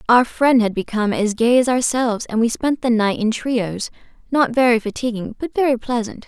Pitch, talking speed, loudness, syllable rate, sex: 235 Hz, 200 wpm, -18 LUFS, 5.3 syllables/s, female